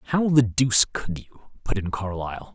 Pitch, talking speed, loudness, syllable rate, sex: 110 Hz, 190 wpm, -23 LUFS, 5.3 syllables/s, male